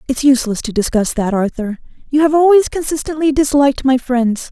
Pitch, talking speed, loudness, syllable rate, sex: 265 Hz, 175 wpm, -15 LUFS, 5.7 syllables/s, female